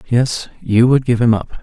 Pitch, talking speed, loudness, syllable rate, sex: 115 Hz, 220 wpm, -15 LUFS, 4.4 syllables/s, male